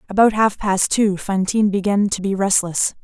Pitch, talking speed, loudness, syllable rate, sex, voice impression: 200 Hz, 180 wpm, -18 LUFS, 5.0 syllables/s, female, feminine, adult-like, slightly relaxed, slightly dark, clear, raspy, intellectual, slightly refreshing, reassuring, elegant, kind, modest